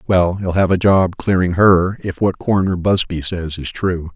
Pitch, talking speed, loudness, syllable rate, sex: 90 Hz, 200 wpm, -16 LUFS, 4.6 syllables/s, male